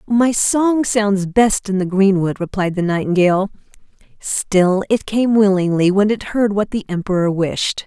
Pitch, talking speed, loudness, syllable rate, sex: 200 Hz, 160 wpm, -16 LUFS, 4.3 syllables/s, female